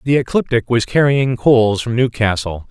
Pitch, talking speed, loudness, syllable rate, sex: 120 Hz, 155 wpm, -15 LUFS, 5.0 syllables/s, male